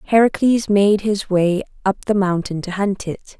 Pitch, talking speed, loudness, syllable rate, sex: 200 Hz, 175 wpm, -18 LUFS, 4.4 syllables/s, female